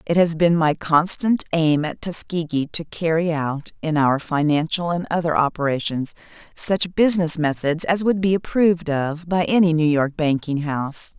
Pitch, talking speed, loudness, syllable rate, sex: 160 Hz, 165 wpm, -20 LUFS, 4.7 syllables/s, female